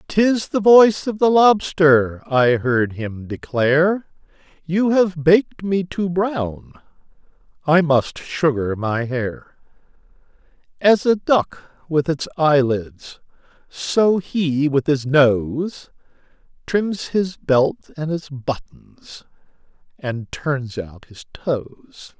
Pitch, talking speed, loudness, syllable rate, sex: 155 Hz, 115 wpm, -19 LUFS, 3.0 syllables/s, male